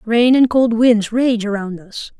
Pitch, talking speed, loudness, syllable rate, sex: 225 Hz, 190 wpm, -15 LUFS, 3.9 syllables/s, female